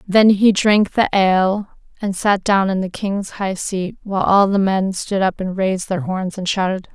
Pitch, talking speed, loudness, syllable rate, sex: 195 Hz, 215 wpm, -18 LUFS, 4.5 syllables/s, female